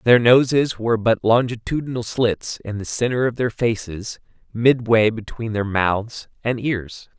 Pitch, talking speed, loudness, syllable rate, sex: 115 Hz, 150 wpm, -20 LUFS, 4.2 syllables/s, male